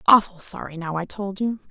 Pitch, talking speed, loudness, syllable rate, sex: 190 Hz, 210 wpm, -24 LUFS, 5.3 syllables/s, female